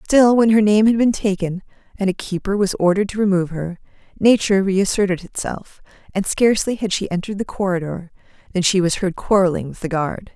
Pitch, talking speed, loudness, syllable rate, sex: 195 Hz, 190 wpm, -18 LUFS, 6.0 syllables/s, female